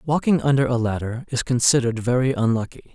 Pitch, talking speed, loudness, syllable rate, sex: 125 Hz, 165 wpm, -21 LUFS, 5.9 syllables/s, male